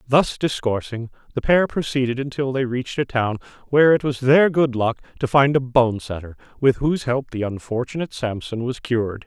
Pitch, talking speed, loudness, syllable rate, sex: 130 Hz, 190 wpm, -21 LUFS, 5.5 syllables/s, male